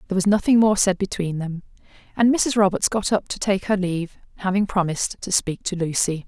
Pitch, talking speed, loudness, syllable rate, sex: 190 Hz, 210 wpm, -21 LUFS, 5.9 syllables/s, female